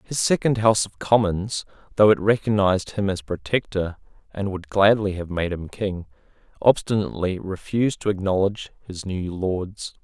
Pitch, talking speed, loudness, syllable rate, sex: 100 Hz, 150 wpm, -22 LUFS, 5.0 syllables/s, male